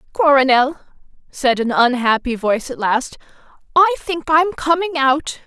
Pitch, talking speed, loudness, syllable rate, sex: 280 Hz, 130 wpm, -16 LUFS, 4.5 syllables/s, female